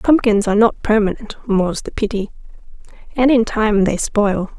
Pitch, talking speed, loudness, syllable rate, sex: 215 Hz, 155 wpm, -16 LUFS, 4.9 syllables/s, female